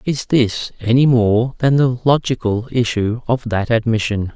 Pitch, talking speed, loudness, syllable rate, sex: 120 Hz, 150 wpm, -17 LUFS, 4.2 syllables/s, male